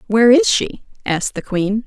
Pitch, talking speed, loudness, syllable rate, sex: 230 Hz, 195 wpm, -16 LUFS, 5.3 syllables/s, female